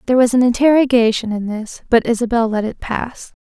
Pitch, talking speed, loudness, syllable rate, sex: 235 Hz, 190 wpm, -16 LUFS, 5.7 syllables/s, female